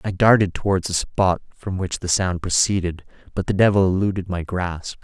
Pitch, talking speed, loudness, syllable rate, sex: 95 Hz, 190 wpm, -21 LUFS, 5.1 syllables/s, male